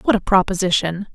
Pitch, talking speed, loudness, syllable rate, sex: 190 Hz, 155 wpm, -18 LUFS, 5.7 syllables/s, female